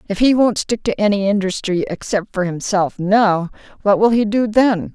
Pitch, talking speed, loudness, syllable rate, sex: 200 Hz, 195 wpm, -17 LUFS, 4.8 syllables/s, female